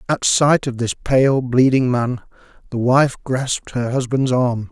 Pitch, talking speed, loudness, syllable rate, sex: 125 Hz, 165 wpm, -17 LUFS, 4.0 syllables/s, male